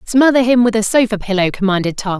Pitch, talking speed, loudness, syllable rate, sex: 215 Hz, 220 wpm, -14 LUFS, 6.2 syllables/s, female